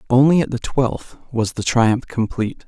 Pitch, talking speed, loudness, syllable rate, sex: 125 Hz, 180 wpm, -19 LUFS, 4.7 syllables/s, male